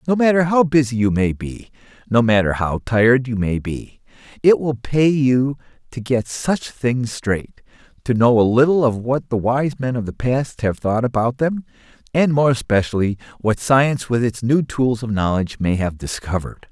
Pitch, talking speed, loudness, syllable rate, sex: 120 Hz, 190 wpm, -18 LUFS, 4.8 syllables/s, male